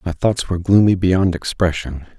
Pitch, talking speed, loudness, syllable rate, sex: 90 Hz, 165 wpm, -17 LUFS, 5.1 syllables/s, male